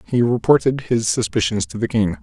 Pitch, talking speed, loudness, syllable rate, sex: 110 Hz, 190 wpm, -19 LUFS, 5.5 syllables/s, male